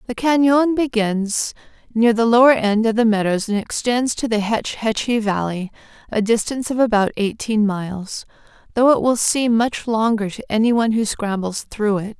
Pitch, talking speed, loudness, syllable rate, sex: 225 Hz, 175 wpm, -18 LUFS, 4.9 syllables/s, female